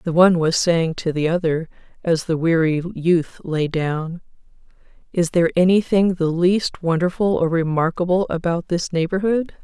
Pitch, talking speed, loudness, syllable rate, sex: 170 Hz, 150 wpm, -19 LUFS, 4.8 syllables/s, female